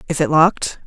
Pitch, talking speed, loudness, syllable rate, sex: 160 Hz, 210 wpm, -15 LUFS, 6.1 syllables/s, female